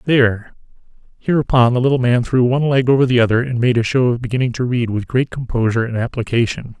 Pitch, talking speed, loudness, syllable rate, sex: 125 Hz, 210 wpm, -16 LUFS, 6.5 syllables/s, male